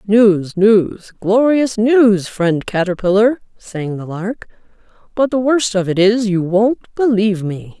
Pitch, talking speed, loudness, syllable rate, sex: 210 Hz, 145 wpm, -15 LUFS, 3.7 syllables/s, female